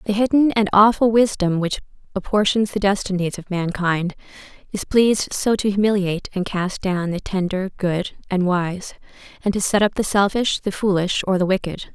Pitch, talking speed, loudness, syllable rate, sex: 195 Hz, 175 wpm, -20 LUFS, 5.0 syllables/s, female